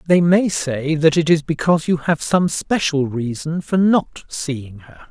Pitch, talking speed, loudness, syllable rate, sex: 160 Hz, 190 wpm, -18 LUFS, 4.1 syllables/s, male